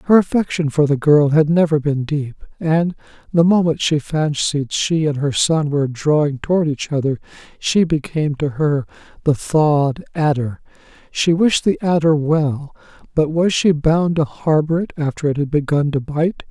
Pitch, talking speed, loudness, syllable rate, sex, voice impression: 150 Hz, 175 wpm, -17 LUFS, 4.6 syllables/s, male, very masculine, very adult-like, very old, thick, very relaxed, very weak, dark, very soft, slightly muffled, slightly fluent, raspy, intellectual, very sincere, very calm, very mature, very friendly, reassuring, very unique, slightly elegant, slightly wild, slightly sweet, very kind, very modest, slightly light